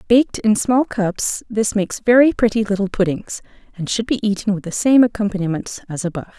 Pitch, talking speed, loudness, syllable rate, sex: 210 Hz, 190 wpm, -18 LUFS, 5.9 syllables/s, female